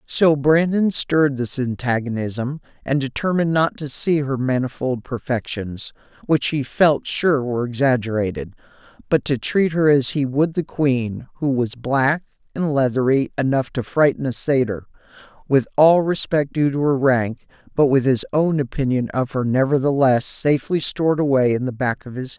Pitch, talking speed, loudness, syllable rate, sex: 135 Hz, 160 wpm, -20 LUFS, 4.8 syllables/s, male